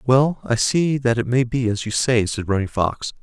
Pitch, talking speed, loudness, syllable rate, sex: 120 Hz, 240 wpm, -20 LUFS, 4.7 syllables/s, male